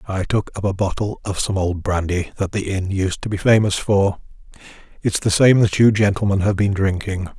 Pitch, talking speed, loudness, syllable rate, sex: 100 Hz, 205 wpm, -19 LUFS, 5.2 syllables/s, male